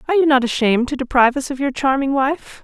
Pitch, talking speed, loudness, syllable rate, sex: 270 Hz, 250 wpm, -17 LUFS, 6.9 syllables/s, female